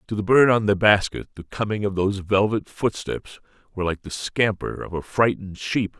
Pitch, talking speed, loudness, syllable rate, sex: 100 Hz, 200 wpm, -22 LUFS, 5.3 syllables/s, male